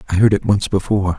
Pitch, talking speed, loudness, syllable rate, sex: 100 Hz, 255 wpm, -17 LUFS, 7.4 syllables/s, male